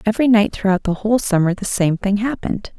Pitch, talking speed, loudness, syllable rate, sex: 205 Hz, 215 wpm, -18 LUFS, 6.4 syllables/s, female